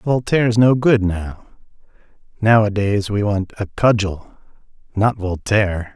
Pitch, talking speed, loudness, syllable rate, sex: 105 Hz, 110 wpm, -17 LUFS, 4.0 syllables/s, male